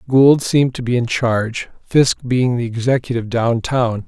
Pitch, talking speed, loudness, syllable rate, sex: 120 Hz, 175 wpm, -17 LUFS, 4.8 syllables/s, male